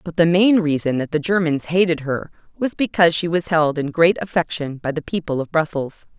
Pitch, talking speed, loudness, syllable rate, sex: 165 Hz, 215 wpm, -19 LUFS, 5.4 syllables/s, female